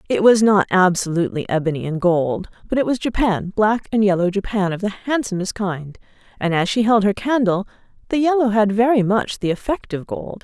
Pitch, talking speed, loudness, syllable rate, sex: 205 Hz, 195 wpm, -19 LUFS, 5.4 syllables/s, female